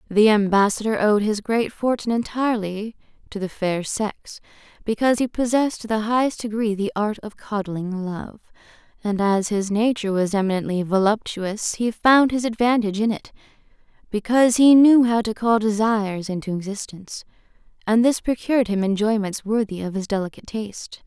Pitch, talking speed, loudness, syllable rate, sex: 215 Hz, 155 wpm, -21 LUFS, 5.4 syllables/s, female